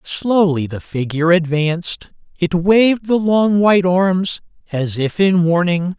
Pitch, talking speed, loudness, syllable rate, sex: 175 Hz, 140 wpm, -16 LUFS, 4.1 syllables/s, male